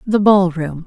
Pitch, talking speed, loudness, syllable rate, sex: 185 Hz, 210 wpm, -15 LUFS, 3.9 syllables/s, female